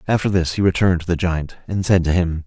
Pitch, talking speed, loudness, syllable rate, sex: 85 Hz, 270 wpm, -19 LUFS, 6.2 syllables/s, male